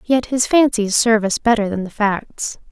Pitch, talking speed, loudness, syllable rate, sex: 225 Hz, 200 wpm, -17 LUFS, 4.8 syllables/s, female